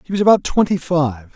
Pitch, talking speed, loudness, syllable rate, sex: 165 Hz, 220 wpm, -17 LUFS, 5.8 syllables/s, male